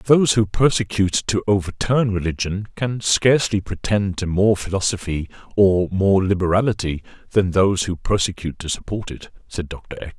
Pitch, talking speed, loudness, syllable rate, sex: 95 Hz, 145 wpm, -20 LUFS, 5.2 syllables/s, male